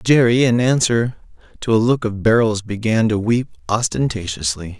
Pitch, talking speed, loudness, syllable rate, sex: 110 Hz, 150 wpm, -18 LUFS, 4.8 syllables/s, male